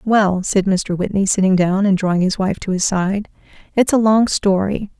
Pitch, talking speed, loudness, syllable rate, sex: 195 Hz, 205 wpm, -17 LUFS, 4.8 syllables/s, female